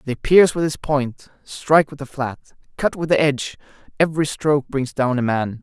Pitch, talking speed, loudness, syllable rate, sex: 140 Hz, 205 wpm, -19 LUFS, 5.3 syllables/s, male